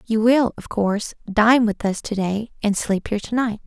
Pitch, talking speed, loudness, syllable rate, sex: 215 Hz, 230 wpm, -20 LUFS, 5.0 syllables/s, female